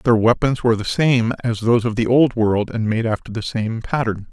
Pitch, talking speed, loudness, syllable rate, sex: 115 Hz, 235 wpm, -19 LUFS, 5.3 syllables/s, male